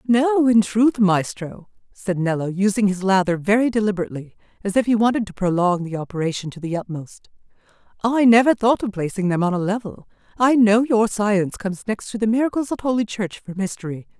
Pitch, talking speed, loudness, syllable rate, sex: 205 Hz, 190 wpm, -20 LUFS, 5.8 syllables/s, female